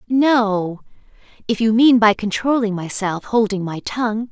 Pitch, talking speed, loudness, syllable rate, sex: 220 Hz, 125 wpm, -18 LUFS, 4.3 syllables/s, female